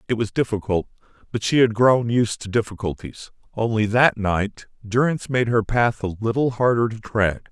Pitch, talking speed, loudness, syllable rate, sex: 110 Hz, 175 wpm, -21 LUFS, 5.0 syllables/s, male